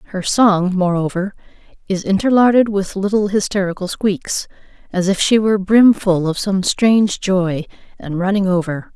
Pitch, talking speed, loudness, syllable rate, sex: 195 Hz, 145 wpm, -16 LUFS, 4.7 syllables/s, female